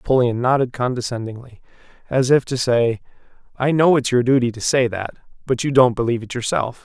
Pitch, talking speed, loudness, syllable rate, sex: 125 Hz, 185 wpm, -19 LUFS, 6.0 syllables/s, male